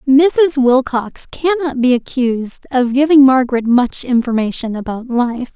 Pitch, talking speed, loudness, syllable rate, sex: 260 Hz, 130 wpm, -14 LUFS, 4.3 syllables/s, female